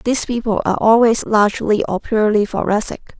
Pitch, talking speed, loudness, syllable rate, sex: 215 Hz, 150 wpm, -16 LUFS, 5.9 syllables/s, female